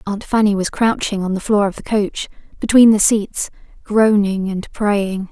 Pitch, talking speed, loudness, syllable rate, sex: 205 Hz, 180 wpm, -16 LUFS, 4.4 syllables/s, female